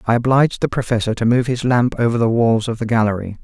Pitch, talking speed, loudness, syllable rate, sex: 115 Hz, 245 wpm, -17 LUFS, 6.5 syllables/s, male